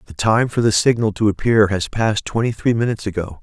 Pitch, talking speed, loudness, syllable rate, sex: 105 Hz, 230 wpm, -18 LUFS, 6.2 syllables/s, male